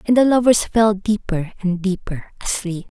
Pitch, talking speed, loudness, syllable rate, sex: 200 Hz, 160 wpm, -19 LUFS, 4.7 syllables/s, female